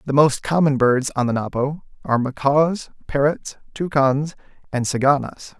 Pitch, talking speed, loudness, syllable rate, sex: 140 Hz, 140 wpm, -20 LUFS, 4.6 syllables/s, male